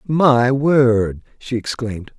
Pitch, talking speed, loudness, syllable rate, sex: 125 Hz, 110 wpm, -17 LUFS, 3.1 syllables/s, male